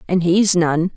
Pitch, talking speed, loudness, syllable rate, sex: 175 Hz, 190 wpm, -16 LUFS, 3.8 syllables/s, female